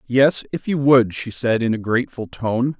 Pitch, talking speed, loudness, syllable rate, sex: 125 Hz, 215 wpm, -19 LUFS, 4.6 syllables/s, male